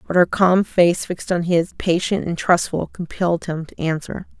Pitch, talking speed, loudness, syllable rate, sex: 175 Hz, 190 wpm, -19 LUFS, 4.9 syllables/s, female